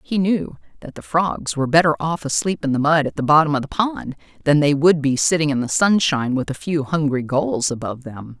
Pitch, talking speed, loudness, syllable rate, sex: 145 Hz, 235 wpm, -19 LUFS, 5.5 syllables/s, female